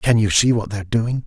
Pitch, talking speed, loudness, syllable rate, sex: 110 Hz, 330 wpm, -18 LUFS, 6.5 syllables/s, male